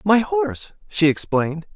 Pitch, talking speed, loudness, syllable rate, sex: 190 Hz, 135 wpm, -20 LUFS, 4.8 syllables/s, male